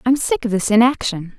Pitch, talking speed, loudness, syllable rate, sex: 235 Hz, 215 wpm, -17 LUFS, 5.6 syllables/s, female